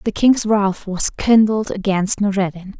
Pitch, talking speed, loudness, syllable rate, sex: 200 Hz, 150 wpm, -17 LUFS, 4.2 syllables/s, female